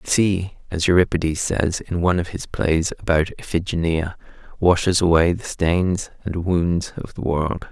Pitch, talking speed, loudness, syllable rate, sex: 85 Hz, 165 wpm, -21 LUFS, 4.5 syllables/s, male